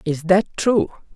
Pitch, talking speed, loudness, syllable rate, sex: 185 Hz, 155 wpm, -19 LUFS, 3.9 syllables/s, female